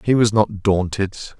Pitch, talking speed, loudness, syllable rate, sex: 105 Hz, 170 wpm, -19 LUFS, 4.5 syllables/s, male